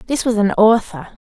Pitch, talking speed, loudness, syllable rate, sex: 215 Hz, 195 wpm, -15 LUFS, 4.5 syllables/s, female